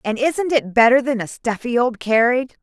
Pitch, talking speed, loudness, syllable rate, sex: 245 Hz, 205 wpm, -18 LUFS, 5.3 syllables/s, female